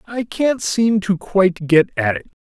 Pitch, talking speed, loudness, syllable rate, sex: 195 Hz, 200 wpm, -17 LUFS, 4.1 syllables/s, male